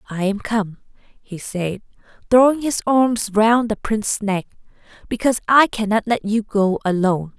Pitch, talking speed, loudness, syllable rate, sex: 215 Hz, 155 wpm, -19 LUFS, 4.5 syllables/s, female